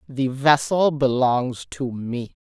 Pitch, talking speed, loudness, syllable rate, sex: 130 Hz, 125 wpm, -21 LUFS, 3.2 syllables/s, female